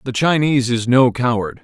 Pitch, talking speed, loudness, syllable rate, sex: 125 Hz, 185 wpm, -16 LUFS, 5.3 syllables/s, male